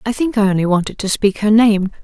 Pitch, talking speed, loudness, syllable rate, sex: 210 Hz, 265 wpm, -15 LUFS, 6.0 syllables/s, female